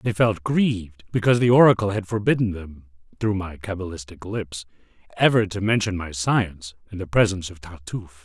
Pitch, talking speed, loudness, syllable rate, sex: 95 Hz, 165 wpm, -22 LUFS, 5.7 syllables/s, male